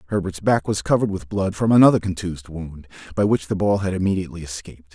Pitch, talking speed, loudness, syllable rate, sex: 90 Hz, 205 wpm, -21 LUFS, 6.8 syllables/s, male